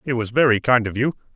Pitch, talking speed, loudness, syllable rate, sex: 120 Hz, 265 wpm, -19 LUFS, 6.4 syllables/s, male